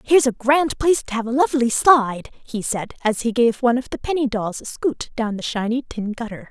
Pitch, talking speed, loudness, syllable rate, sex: 245 Hz, 240 wpm, -20 LUFS, 5.7 syllables/s, female